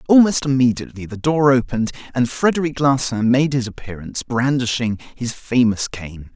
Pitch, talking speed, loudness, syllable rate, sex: 125 Hz, 140 wpm, -19 LUFS, 5.3 syllables/s, male